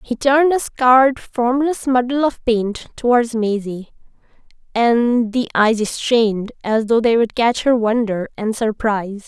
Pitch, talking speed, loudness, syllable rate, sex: 235 Hz, 150 wpm, -17 LUFS, 4.1 syllables/s, female